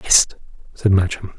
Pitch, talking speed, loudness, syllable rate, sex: 95 Hz, 130 wpm, -18 LUFS, 4.2 syllables/s, male